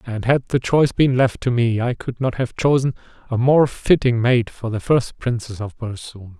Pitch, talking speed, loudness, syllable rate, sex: 120 Hz, 215 wpm, -19 LUFS, 4.8 syllables/s, male